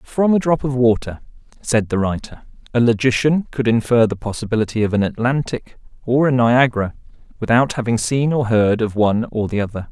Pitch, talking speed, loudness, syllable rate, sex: 120 Hz, 180 wpm, -18 LUFS, 5.6 syllables/s, male